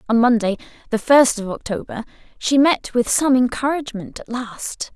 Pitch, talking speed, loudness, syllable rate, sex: 240 Hz, 155 wpm, -19 LUFS, 4.9 syllables/s, female